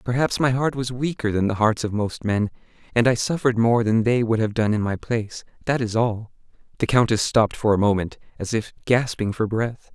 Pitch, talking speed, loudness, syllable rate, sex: 115 Hz, 225 wpm, -22 LUFS, 5.5 syllables/s, male